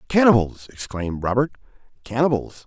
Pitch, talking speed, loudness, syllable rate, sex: 120 Hz, 90 wpm, -21 LUFS, 5.7 syllables/s, male